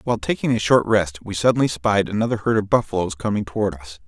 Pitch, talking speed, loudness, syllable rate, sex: 100 Hz, 220 wpm, -20 LUFS, 6.4 syllables/s, male